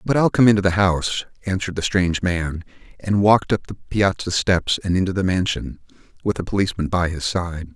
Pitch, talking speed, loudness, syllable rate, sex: 95 Hz, 200 wpm, -20 LUFS, 6.0 syllables/s, male